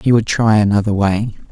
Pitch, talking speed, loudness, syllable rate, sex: 105 Hz, 200 wpm, -15 LUFS, 5.3 syllables/s, male